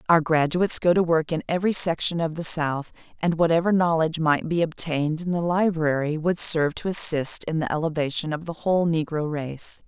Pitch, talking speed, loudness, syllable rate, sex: 165 Hz, 195 wpm, -22 LUFS, 5.5 syllables/s, female